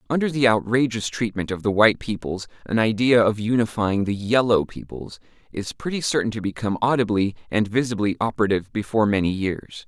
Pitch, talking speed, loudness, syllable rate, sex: 110 Hz, 165 wpm, -22 LUFS, 5.9 syllables/s, male